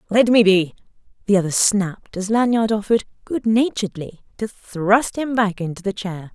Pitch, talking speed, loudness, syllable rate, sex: 205 Hz, 170 wpm, -19 LUFS, 5.1 syllables/s, female